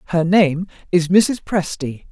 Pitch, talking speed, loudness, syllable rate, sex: 175 Hz, 140 wpm, -18 LUFS, 3.8 syllables/s, female